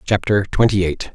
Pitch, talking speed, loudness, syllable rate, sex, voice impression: 100 Hz, 155 wpm, -18 LUFS, 4.8 syllables/s, male, masculine, adult-like, clear, refreshing, slightly sincere, elegant, slightly sweet